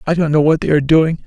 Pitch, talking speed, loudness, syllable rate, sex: 155 Hz, 335 wpm, -14 LUFS, 7.3 syllables/s, male